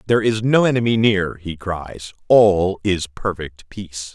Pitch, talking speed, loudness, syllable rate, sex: 100 Hz, 160 wpm, -18 LUFS, 4.2 syllables/s, male